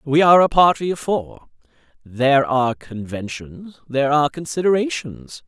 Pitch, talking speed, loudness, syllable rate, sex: 140 Hz, 130 wpm, -18 LUFS, 5.1 syllables/s, male